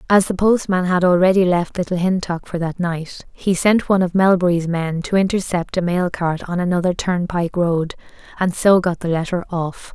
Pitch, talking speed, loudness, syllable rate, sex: 180 Hz, 195 wpm, -18 LUFS, 5.1 syllables/s, female